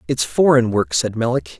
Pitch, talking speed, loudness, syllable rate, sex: 130 Hz, 190 wpm, -17 LUFS, 4.9 syllables/s, male